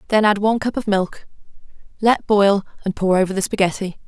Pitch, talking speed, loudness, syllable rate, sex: 200 Hz, 190 wpm, -19 LUFS, 5.9 syllables/s, female